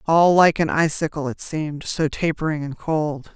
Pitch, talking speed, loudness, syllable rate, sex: 155 Hz, 180 wpm, -21 LUFS, 4.6 syllables/s, female